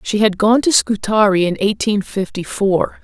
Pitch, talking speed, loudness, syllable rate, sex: 205 Hz, 180 wpm, -16 LUFS, 4.5 syllables/s, female